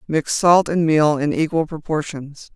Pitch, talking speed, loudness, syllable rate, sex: 155 Hz, 165 wpm, -18 LUFS, 4.2 syllables/s, female